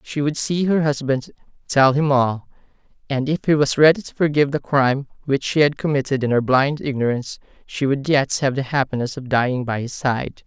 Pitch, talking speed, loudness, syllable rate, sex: 140 Hz, 205 wpm, -19 LUFS, 5.4 syllables/s, male